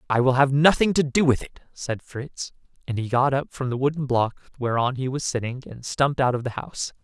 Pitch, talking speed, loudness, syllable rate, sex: 130 Hz, 240 wpm, -23 LUFS, 5.7 syllables/s, male